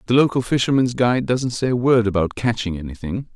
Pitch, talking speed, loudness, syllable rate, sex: 115 Hz, 195 wpm, -20 LUFS, 6.0 syllables/s, male